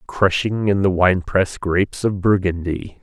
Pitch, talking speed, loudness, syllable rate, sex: 95 Hz, 140 wpm, -19 LUFS, 4.5 syllables/s, male